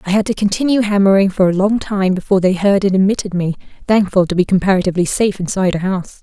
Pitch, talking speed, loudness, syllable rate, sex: 195 Hz, 220 wpm, -15 LUFS, 7.1 syllables/s, female